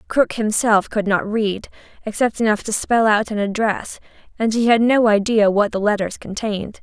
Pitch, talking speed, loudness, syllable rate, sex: 215 Hz, 185 wpm, -18 LUFS, 4.9 syllables/s, female